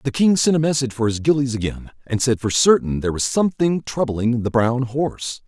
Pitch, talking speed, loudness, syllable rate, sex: 130 Hz, 220 wpm, -19 LUFS, 5.8 syllables/s, male